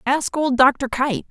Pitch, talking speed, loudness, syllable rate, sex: 265 Hz, 185 wpm, -19 LUFS, 3.4 syllables/s, female